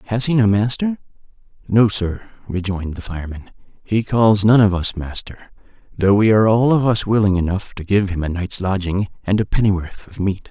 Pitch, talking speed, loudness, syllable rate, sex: 100 Hz, 195 wpm, -18 LUFS, 5.5 syllables/s, male